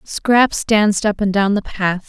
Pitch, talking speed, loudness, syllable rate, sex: 205 Hz, 200 wpm, -16 LUFS, 4.1 syllables/s, female